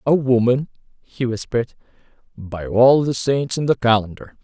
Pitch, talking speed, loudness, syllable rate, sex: 125 Hz, 150 wpm, -18 LUFS, 4.8 syllables/s, male